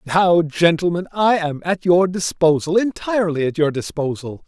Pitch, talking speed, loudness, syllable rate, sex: 170 Hz, 145 wpm, -18 LUFS, 4.7 syllables/s, male